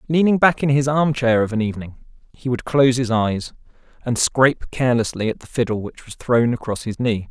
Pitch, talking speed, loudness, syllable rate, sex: 125 Hz, 215 wpm, -19 LUFS, 5.7 syllables/s, male